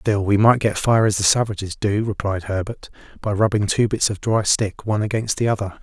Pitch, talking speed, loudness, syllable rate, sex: 105 Hz, 225 wpm, -20 LUFS, 5.5 syllables/s, male